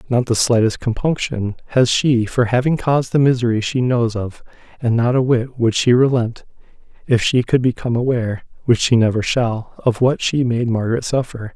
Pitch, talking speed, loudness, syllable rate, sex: 120 Hz, 185 wpm, -17 LUFS, 5.1 syllables/s, male